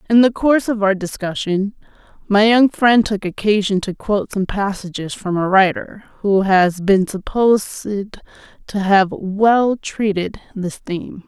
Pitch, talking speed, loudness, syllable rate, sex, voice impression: 205 Hz, 150 wpm, -17 LUFS, 4.2 syllables/s, female, feminine, adult-like, relaxed, bright, soft, slightly muffled, slightly raspy, intellectual, friendly, reassuring, kind